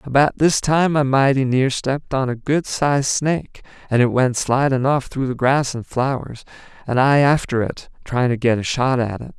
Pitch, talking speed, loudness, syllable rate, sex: 130 Hz, 210 wpm, -19 LUFS, 4.9 syllables/s, male